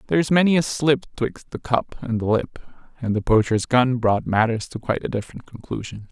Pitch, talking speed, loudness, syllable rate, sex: 125 Hz, 205 wpm, -21 LUFS, 5.5 syllables/s, male